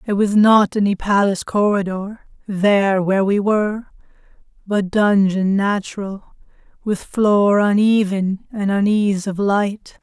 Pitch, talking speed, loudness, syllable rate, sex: 200 Hz, 120 wpm, -17 LUFS, 4.2 syllables/s, female